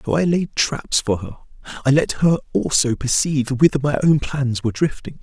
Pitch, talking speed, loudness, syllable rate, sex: 140 Hz, 195 wpm, -19 LUFS, 5.4 syllables/s, male